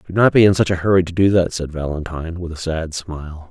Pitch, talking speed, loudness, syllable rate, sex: 85 Hz, 275 wpm, -18 LUFS, 6.3 syllables/s, male